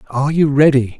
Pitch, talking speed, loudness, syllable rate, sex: 140 Hz, 180 wpm, -14 LUFS, 6.5 syllables/s, male